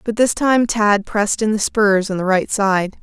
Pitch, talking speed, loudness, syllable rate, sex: 210 Hz, 240 wpm, -17 LUFS, 4.5 syllables/s, female